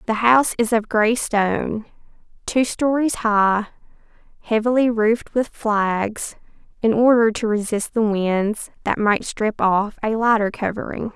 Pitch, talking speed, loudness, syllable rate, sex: 220 Hz, 140 wpm, -20 LUFS, 4.1 syllables/s, female